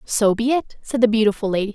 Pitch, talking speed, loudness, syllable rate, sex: 225 Hz, 240 wpm, -19 LUFS, 6.3 syllables/s, female